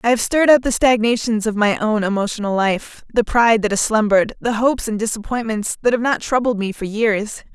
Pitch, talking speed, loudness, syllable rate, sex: 220 Hz, 215 wpm, -18 LUFS, 5.8 syllables/s, female